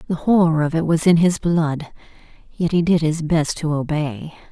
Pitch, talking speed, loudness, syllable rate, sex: 160 Hz, 200 wpm, -19 LUFS, 4.7 syllables/s, female